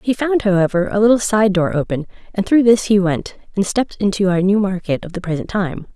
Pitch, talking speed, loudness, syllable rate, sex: 195 Hz, 230 wpm, -17 LUFS, 5.8 syllables/s, female